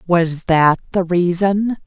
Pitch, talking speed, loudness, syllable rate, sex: 180 Hz, 130 wpm, -16 LUFS, 3.4 syllables/s, female